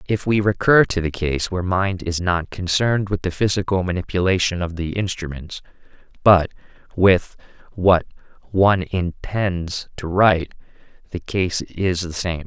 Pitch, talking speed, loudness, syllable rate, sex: 90 Hz, 145 wpm, -20 LUFS, 4.6 syllables/s, male